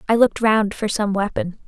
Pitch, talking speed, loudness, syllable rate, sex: 215 Hz, 215 wpm, -19 LUFS, 5.6 syllables/s, female